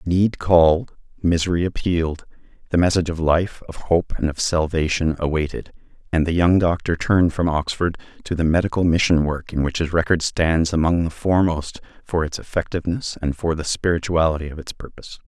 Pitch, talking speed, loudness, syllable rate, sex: 85 Hz, 170 wpm, -20 LUFS, 5.7 syllables/s, male